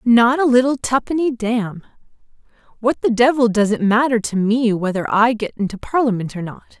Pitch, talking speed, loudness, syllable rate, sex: 230 Hz, 175 wpm, -17 LUFS, 5.3 syllables/s, female